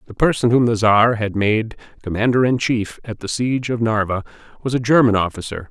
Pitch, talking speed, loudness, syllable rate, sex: 115 Hz, 200 wpm, -18 LUFS, 5.6 syllables/s, male